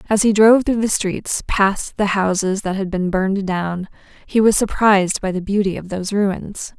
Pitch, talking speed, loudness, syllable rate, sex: 195 Hz, 205 wpm, -18 LUFS, 4.8 syllables/s, female